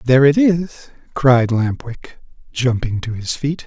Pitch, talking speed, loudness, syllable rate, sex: 130 Hz, 165 wpm, -17 LUFS, 3.9 syllables/s, male